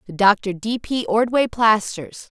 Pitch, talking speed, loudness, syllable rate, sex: 225 Hz, 150 wpm, -19 LUFS, 3.7 syllables/s, female